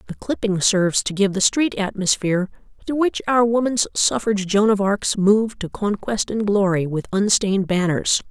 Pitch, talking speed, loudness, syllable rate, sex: 205 Hz, 175 wpm, -19 LUFS, 4.9 syllables/s, female